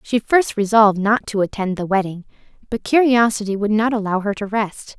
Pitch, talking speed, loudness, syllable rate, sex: 210 Hz, 190 wpm, -18 LUFS, 5.4 syllables/s, female